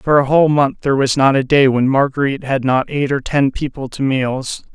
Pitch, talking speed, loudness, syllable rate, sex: 135 Hz, 240 wpm, -15 LUFS, 5.4 syllables/s, male